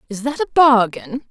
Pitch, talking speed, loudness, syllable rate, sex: 250 Hz, 185 wpm, -16 LUFS, 5.0 syllables/s, female